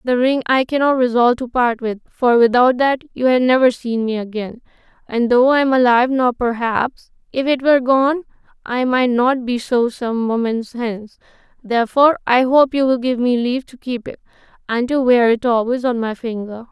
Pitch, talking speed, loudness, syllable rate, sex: 245 Hz, 195 wpm, -17 LUFS, 5.1 syllables/s, female